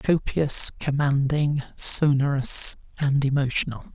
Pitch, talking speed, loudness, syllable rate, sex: 140 Hz, 75 wpm, -21 LUFS, 3.7 syllables/s, male